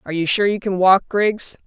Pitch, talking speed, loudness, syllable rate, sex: 190 Hz, 255 wpm, -17 LUFS, 5.3 syllables/s, female